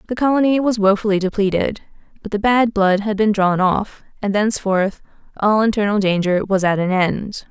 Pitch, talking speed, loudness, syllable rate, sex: 205 Hz, 175 wpm, -17 LUFS, 5.2 syllables/s, female